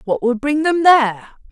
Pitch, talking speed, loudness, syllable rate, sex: 270 Hz, 200 wpm, -15 LUFS, 5.0 syllables/s, female